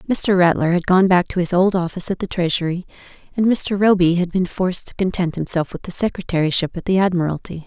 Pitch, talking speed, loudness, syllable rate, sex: 180 Hz, 210 wpm, -19 LUFS, 6.2 syllables/s, female